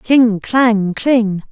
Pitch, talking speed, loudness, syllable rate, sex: 225 Hz, 120 wpm, -14 LUFS, 2.1 syllables/s, female